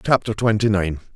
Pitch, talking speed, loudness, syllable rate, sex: 100 Hz, 155 wpm, -20 LUFS, 5.6 syllables/s, male